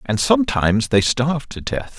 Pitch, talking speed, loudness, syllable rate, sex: 130 Hz, 180 wpm, -18 LUFS, 5.3 syllables/s, male